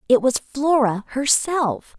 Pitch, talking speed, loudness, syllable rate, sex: 265 Hz, 120 wpm, -20 LUFS, 3.6 syllables/s, female